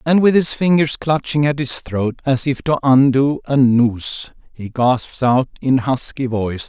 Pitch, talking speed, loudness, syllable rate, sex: 130 Hz, 180 wpm, -16 LUFS, 4.3 syllables/s, male